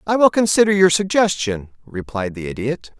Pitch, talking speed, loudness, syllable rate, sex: 155 Hz, 160 wpm, -18 LUFS, 5.2 syllables/s, male